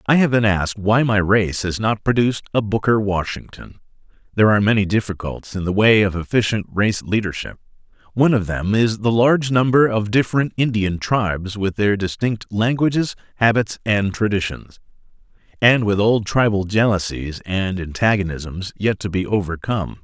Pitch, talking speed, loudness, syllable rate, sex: 105 Hz, 160 wpm, -19 LUFS, 5.2 syllables/s, male